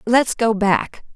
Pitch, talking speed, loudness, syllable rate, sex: 225 Hz, 155 wpm, -18 LUFS, 3.2 syllables/s, female